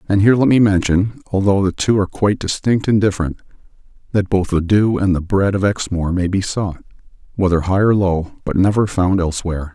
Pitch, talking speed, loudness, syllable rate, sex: 95 Hz, 190 wpm, -17 LUFS, 5.8 syllables/s, male